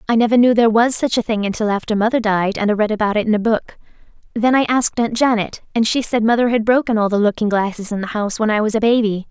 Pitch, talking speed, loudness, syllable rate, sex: 220 Hz, 275 wpm, -17 LUFS, 6.8 syllables/s, female